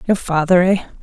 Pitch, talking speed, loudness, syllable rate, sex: 180 Hz, 175 wpm, -16 LUFS, 6.3 syllables/s, female